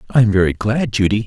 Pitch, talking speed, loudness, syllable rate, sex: 105 Hz, 235 wpm, -16 LUFS, 6.5 syllables/s, male